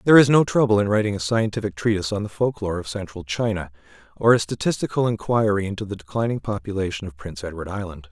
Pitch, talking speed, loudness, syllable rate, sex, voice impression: 105 Hz, 205 wpm, -22 LUFS, 6.8 syllables/s, male, masculine, adult-like, tensed, clear, fluent, cool, intellectual, slightly friendly, lively, kind, slightly strict